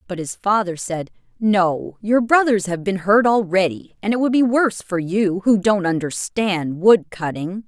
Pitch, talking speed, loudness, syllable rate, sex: 195 Hz, 180 wpm, -19 LUFS, 4.4 syllables/s, female